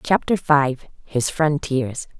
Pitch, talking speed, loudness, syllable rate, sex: 145 Hz, 80 wpm, -21 LUFS, 3.2 syllables/s, female